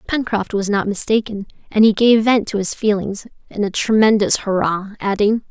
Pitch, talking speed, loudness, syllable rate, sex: 210 Hz, 175 wpm, -17 LUFS, 5.0 syllables/s, female